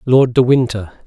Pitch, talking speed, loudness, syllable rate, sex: 120 Hz, 170 wpm, -14 LUFS, 4.8 syllables/s, male